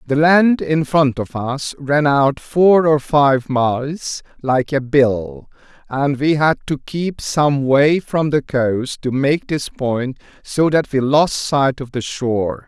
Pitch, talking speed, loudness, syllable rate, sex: 140 Hz, 175 wpm, -17 LUFS, 3.4 syllables/s, male